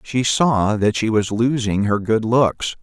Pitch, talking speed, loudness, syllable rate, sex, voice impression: 110 Hz, 190 wpm, -18 LUFS, 3.7 syllables/s, male, masculine, middle-aged, tensed, powerful, hard, fluent, cool, intellectual, calm, friendly, wild, very sweet, slightly kind